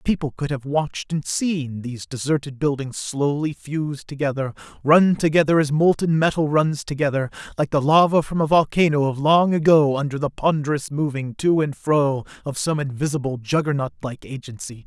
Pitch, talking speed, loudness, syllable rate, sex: 145 Hz, 160 wpm, -21 LUFS, 5.3 syllables/s, male